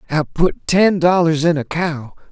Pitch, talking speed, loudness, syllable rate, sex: 165 Hz, 180 wpm, -16 LUFS, 4.1 syllables/s, male